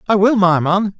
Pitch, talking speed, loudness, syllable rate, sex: 195 Hz, 240 wpm, -14 LUFS, 4.9 syllables/s, male